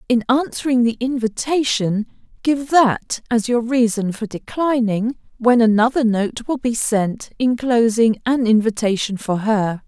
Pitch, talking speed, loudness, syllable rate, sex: 235 Hz, 135 wpm, -18 LUFS, 4.1 syllables/s, female